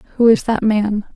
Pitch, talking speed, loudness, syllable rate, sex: 215 Hz, 210 wpm, -16 LUFS, 5.6 syllables/s, female